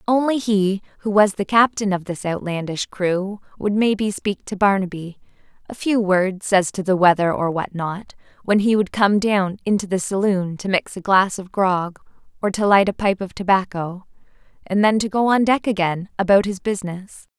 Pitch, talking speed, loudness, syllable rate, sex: 195 Hz, 195 wpm, -20 LUFS, 4.8 syllables/s, female